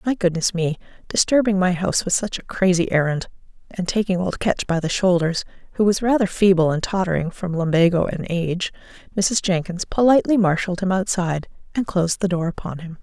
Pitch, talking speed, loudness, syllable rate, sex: 185 Hz, 185 wpm, -20 LUFS, 5.8 syllables/s, female